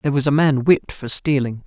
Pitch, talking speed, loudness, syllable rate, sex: 140 Hz, 250 wpm, -18 LUFS, 5.5 syllables/s, male